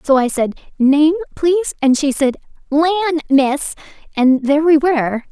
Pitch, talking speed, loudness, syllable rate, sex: 295 Hz, 160 wpm, -15 LUFS, 5.0 syllables/s, female